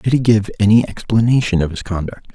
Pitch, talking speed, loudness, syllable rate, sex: 105 Hz, 205 wpm, -16 LUFS, 6.1 syllables/s, male